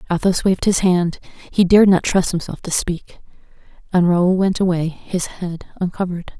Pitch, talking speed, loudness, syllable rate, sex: 180 Hz, 160 wpm, -18 LUFS, 5.0 syllables/s, female